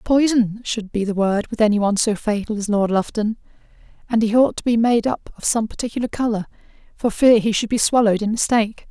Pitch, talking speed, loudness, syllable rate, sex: 220 Hz, 215 wpm, -19 LUFS, 5.9 syllables/s, female